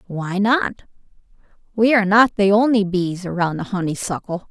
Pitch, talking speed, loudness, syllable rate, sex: 200 Hz, 145 wpm, -18 LUFS, 5.0 syllables/s, female